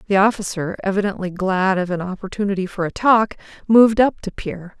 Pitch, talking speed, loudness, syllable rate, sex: 195 Hz, 175 wpm, -19 LUFS, 5.9 syllables/s, female